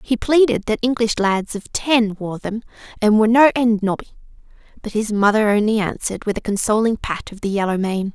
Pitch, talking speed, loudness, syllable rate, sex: 215 Hz, 200 wpm, -18 LUFS, 5.6 syllables/s, female